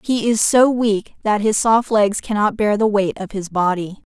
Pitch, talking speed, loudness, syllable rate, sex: 210 Hz, 220 wpm, -17 LUFS, 4.4 syllables/s, female